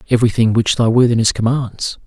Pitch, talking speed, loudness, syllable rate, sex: 115 Hz, 145 wpm, -15 LUFS, 6.0 syllables/s, male